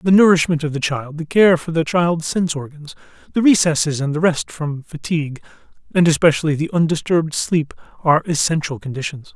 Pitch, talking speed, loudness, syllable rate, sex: 160 Hz, 175 wpm, -18 LUFS, 5.8 syllables/s, male